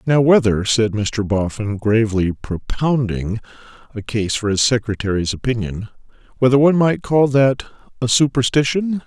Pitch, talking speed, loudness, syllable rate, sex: 120 Hz, 130 wpm, -18 LUFS, 4.8 syllables/s, male